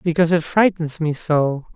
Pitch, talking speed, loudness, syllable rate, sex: 160 Hz, 170 wpm, -19 LUFS, 5.0 syllables/s, male